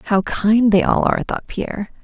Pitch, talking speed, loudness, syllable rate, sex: 210 Hz, 205 wpm, -18 LUFS, 5.6 syllables/s, female